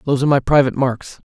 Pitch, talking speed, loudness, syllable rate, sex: 135 Hz, 230 wpm, -16 LUFS, 8.3 syllables/s, male